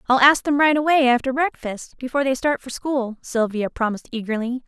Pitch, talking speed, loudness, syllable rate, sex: 260 Hz, 195 wpm, -20 LUFS, 5.8 syllables/s, female